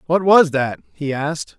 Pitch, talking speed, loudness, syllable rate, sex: 155 Hz, 190 wpm, -18 LUFS, 4.6 syllables/s, male